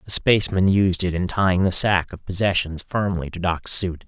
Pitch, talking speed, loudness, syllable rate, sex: 90 Hz, 205 wpm, -20 LUFS, 5.1 syllables/s, male